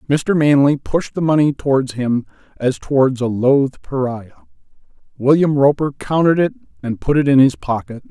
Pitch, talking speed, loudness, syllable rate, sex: 135 Hz, 165 wpm, -16 LUFS, 5.0 syllables/s, male